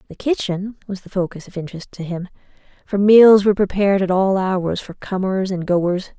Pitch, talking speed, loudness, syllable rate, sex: 190 Hz, 195 wpm, -18 LUFS, 5.3 syllables/s, female